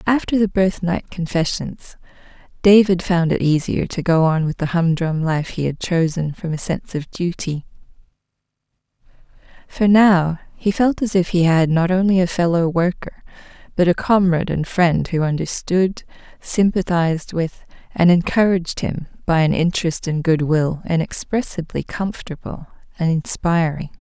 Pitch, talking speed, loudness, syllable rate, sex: 175 Hz, 145 wpm, -19 LUFS, 4.7 syllables/s, female